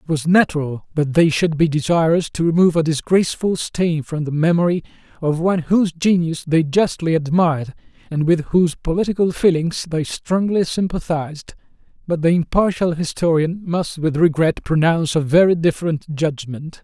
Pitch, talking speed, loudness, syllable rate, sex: 165 Hz, 155 wpm, -18 LUFS, 5.2 syllables/s, male